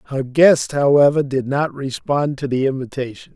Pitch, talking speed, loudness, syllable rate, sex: 135 Hz, 160 wpm, -18 LUFS, 4.8 syllables/s, male